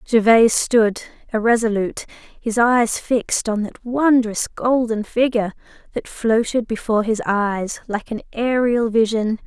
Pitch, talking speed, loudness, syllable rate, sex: 225 Hz, 125 wpm, -19 LUFS, 4.5 syllables/s, female